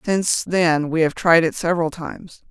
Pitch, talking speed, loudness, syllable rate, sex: 165 Hz, 190 wpm, -18 LUFS, 5.2 syllables/s, female